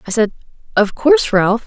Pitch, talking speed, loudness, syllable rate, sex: 205 Hz, 180 wpm, -15 LUFS, 5.6 syllables/s, female